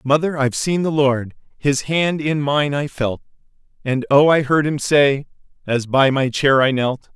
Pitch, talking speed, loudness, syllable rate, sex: 140 Hz, 195 wpm, -18 LUFS, 4.4 syllables/s, male